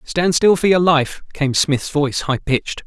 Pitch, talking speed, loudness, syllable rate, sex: 155 Hz, 210 wpm, -17 LUFS, 4.5 syllables/s, male